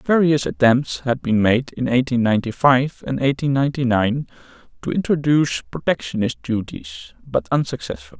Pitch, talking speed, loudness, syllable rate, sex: 125 Hz, 140 wpm, -20 LUFS, 5.2 syllables/s, male